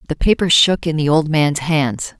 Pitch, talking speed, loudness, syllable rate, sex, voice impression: 155 Hz, 220 wpm, -15 LUFS, 4.6 syllables/s, female, very feminine, very adult-like, middle-aged, thin, tensed, slightly powerful, bright, slightly soft, very clear, fluent, cool, very intellectual, refreshing, very sincere, calm, friendly, reassuring, elegant, slightly sweet, lively, kind